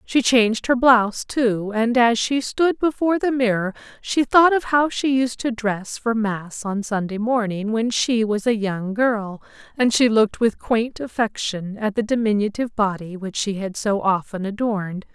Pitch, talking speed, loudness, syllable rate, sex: 225 Hz, 185 wpm, -20 LUFS, 4.5 syllables/s, female